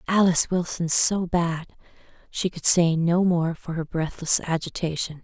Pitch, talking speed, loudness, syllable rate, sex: 170 Hz, 150 wpm, -22 LUFS, 4.5 syllables/s, female